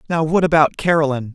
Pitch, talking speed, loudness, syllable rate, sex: 155 Hz, 180 wpm, -16 LUFS, 7.0 syllables/s, male